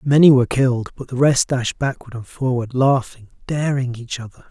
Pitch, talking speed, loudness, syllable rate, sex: 130 Hz, 185 wpm, -19 LUFS, 5.3 syllables/s, male